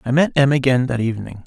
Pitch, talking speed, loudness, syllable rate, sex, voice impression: 130 Hz, 245 wpm, -17 LUFS, 6.7 syllables/s, male, masculine, middle-aged, relaxed, dark, clear, fluent, calm, reassuring, wild, kind, modest